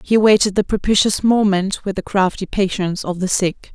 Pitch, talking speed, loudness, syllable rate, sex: 195 Hz, 190 wpm, -17 LUFS, 5.5 syllables/s, female